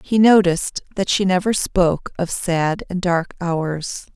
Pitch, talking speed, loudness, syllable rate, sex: 180 Hz, 160 wpm, -19 LUFS, 4.1 syllables/s, female